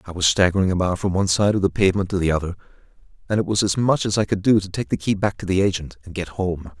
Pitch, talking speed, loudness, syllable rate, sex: 95 Hz, 290 wpm, -21 LUFS, 7.0 syllables/s, male